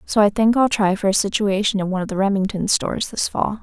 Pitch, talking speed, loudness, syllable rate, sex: 200 Hz, 265 wpm, -19 LUFS, 6.2 syllables/s, female